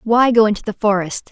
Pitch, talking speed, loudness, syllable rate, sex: 215 Hz, 230 wpm, -16 LUFS, 5.8 syllables/s, female